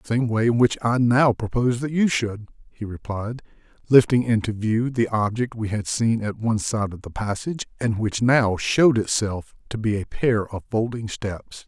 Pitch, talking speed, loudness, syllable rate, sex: 115 Hz, 200 wpm, -22 LUFS, 4.8 syllables/s, male